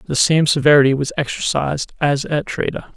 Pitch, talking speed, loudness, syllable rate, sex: 145 Hz, 160 wpm, -17 LUFS, 5.8 syllables/s, male